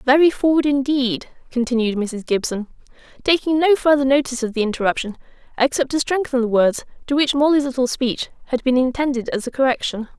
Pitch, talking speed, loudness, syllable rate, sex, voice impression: 265 Hz, 170 wpm, -19 LUFS, 5.9 syllables/s, female, very feminine, young, slightly adult-like, very thin, slightly tensed, slightly weak, very bright, hard, very clear, very fluent, very cute, very intellectual, refreshing, sincere, slightly calm, very friendly, reassuring, very unique, very elegant, sweet, very lively, kind, intense, slightly sharp, very light